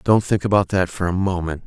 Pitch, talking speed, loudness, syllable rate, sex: 90 Hz, 250 wpm, -20 LUFS, 5.7 syllables/s, male